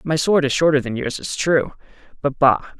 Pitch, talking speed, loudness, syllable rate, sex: 145 Hz, 215 wpm, -19 LUFS, 5.4 syllables/s, male